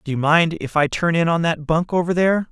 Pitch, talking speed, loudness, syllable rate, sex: 165 Hz, 260 wpm, -19 LUFS, 5.5 syllables/s, male